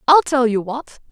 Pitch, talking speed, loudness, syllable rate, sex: 260 Hz, 215 wpm, -17 LUFS, 4.6 syllables/s, female